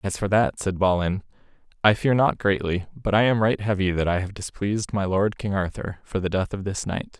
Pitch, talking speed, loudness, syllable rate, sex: 100 Hz, 235 wpm, -24 LUFS, 5.3 syllables/s, male